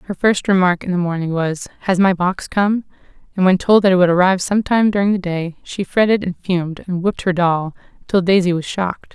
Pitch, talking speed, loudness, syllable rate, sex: 185 Hz, 225 wpm, -17 LUFS, 6.0 syllables/s, female